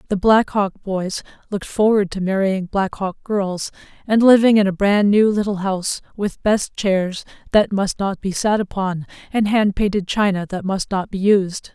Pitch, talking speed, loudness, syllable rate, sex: 200 Hz, 190 wpm, -19 LUFS, 4.5 syllables/s, female